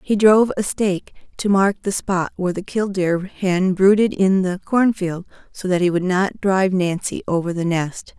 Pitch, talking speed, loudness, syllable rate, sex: 190 Hz, 200 wpm, -19 LUFS, 4.8 syllables/s, female